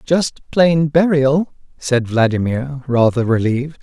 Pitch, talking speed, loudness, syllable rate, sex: 140 Hz, 110 wpm, -16 LUFS, 3.8 syllables/s, male